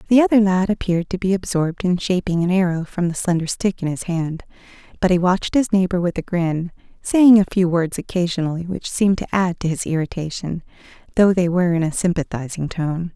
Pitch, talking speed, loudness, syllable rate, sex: 180 Hz, 205 wpm, -19 LUFS, 5.8 syllables/s, female